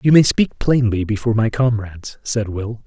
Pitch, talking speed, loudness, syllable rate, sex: 115 Hz, 190 wpm, -18 LUFS, 5.1 syllables/s, male